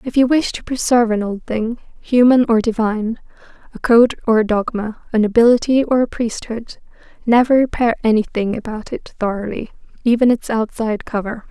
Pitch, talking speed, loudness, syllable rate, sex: 230 Hz, 160 wpm, -17 LUFS, 5.3 syllables/s, female